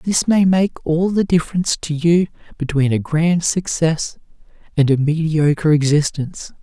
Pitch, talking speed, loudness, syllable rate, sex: 160 Hz, 145 wpm, -17 LUFS, 4.6 syllables/s, male